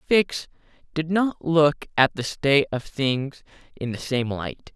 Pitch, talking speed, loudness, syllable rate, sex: 145 Hz, 165 wpm, -23 LUFS, 3.7 syllables/s, male